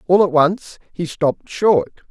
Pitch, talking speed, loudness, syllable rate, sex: 165 Hz, 170 wpm, -17 LUFS, 4.1 syllables/s, male